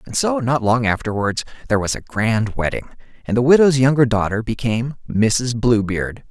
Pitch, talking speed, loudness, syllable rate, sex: 120 Hz, 170 wpm, -18 LUFS, 5.2 syllables/s, male